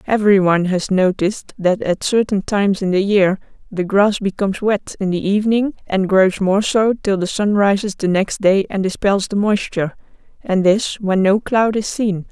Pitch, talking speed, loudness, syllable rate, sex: 200 Hz, 190 wpm, -17 LUFS, 4.8 syllables/s, female